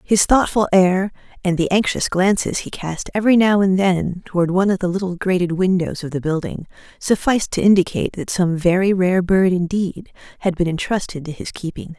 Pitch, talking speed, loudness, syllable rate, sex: 185 Hz, 190 wpm, -18 LUFS, 5.5 syllables/s, female